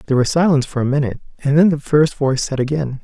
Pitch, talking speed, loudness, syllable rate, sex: 140 Hz, 255 wpm, -17 LUFS, 7.5 syllables/s, male